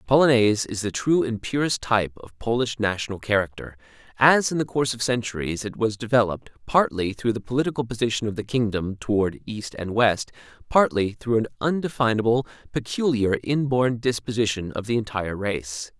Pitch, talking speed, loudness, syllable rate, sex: 115 Hz, 165 wpm, -23 LUFS, 5.7 syllables/s, male